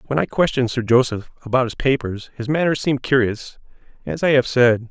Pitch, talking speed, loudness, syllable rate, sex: 125 Hz, 195 wpm, -19 LUFS, 5.8 syllables/s, male